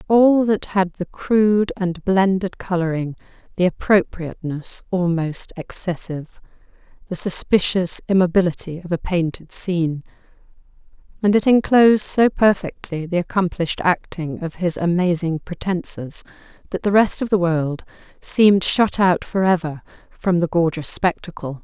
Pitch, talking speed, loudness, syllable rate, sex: 180 Hz, 125 wpm, -19 LUFS, 4.6 syllables/s, female